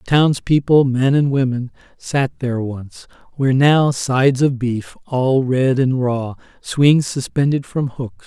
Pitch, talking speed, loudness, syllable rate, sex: 130 Hz, 145 wpm, -17 LUFS, 3.9 syllables/s, male